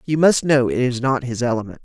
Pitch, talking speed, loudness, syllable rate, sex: 135 Hz, 260 wpm, -18 LUFS, 5.8 syllables/s, female